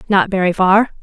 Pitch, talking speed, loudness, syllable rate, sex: 195 Hz, 175 wpm, -14 LUFS, 5.2 syllables/s, female